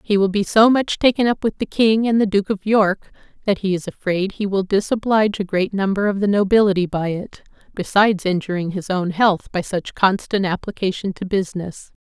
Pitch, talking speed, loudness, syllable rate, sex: 200 Hz, 205 wpm, -19 LUFS, 5.4 syllables/s, female